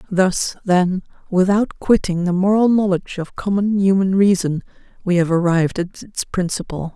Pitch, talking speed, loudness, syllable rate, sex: 190 Hz, 145 wpm, -18 LUFS, 4.8 syllables/s, female